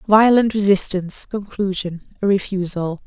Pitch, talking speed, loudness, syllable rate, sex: 195 Hz, 100 wpm, -19 LUFS, 4.6 syllables/s, female